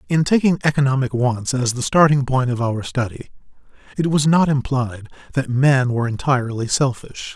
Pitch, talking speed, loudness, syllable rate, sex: 130 Hz, 165 wpm, -19 LUFS, 5.2 syllables/s, male